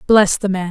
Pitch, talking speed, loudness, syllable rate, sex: 195 Hz, 255 wpm, -15 LUFS, 5.0 syllables/s, female